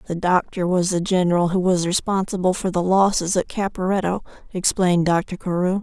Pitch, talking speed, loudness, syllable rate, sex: 180 Hz, 165 wpm, -20 LUFS, 5.4 syllables/s, female